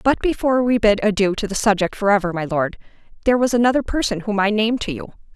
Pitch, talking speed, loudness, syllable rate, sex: 215 Hz, 225 wpm, -19 LUFS, 6.9 syllables/s, female